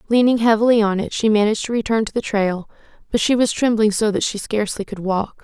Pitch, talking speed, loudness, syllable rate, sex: 215 Hz, 230 wpm, -18 LUFS, 6.2 syllables/s, female